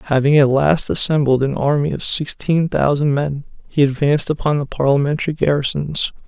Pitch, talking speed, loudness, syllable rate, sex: 145 Hz, 155 wpm, -17 LUFS, 5.3 syllables/s, male